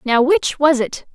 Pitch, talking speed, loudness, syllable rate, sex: 280 Hz, 210 wpm, -16 LUFS, 4.0 syllables/s, female